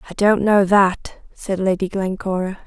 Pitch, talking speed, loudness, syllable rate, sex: 195 Hz, 160 wpm, -18 LUFS, 4.4 syllables/s, female